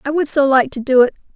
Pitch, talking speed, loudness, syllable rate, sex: 270 Hz, 310 wpm, -15 LUFS, 6.5 syllables/s, female